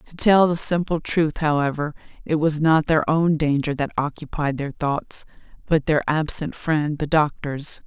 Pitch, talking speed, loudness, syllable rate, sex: 155 Hz, 170 wpm, -21 LUFS, 4.3 syllables/s, female